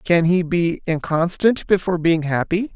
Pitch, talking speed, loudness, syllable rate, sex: 175 Hz, 155 wpm, -19 LUFS, 4.5 syllables/s, male